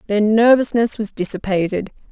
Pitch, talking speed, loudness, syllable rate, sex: 210 Hz, 115 wpm, -17 LUFS, 5.1 syllables/s, female